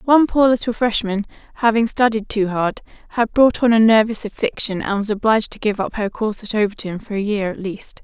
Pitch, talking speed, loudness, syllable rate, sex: 215 Hz, 215 wpm, -18 LUFS, 5.8 syllables/s, female